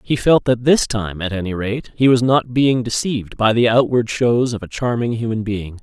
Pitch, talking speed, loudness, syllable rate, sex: 115 Hz, 225 wpm, -17 LUFS, 4.9 syllables/s, male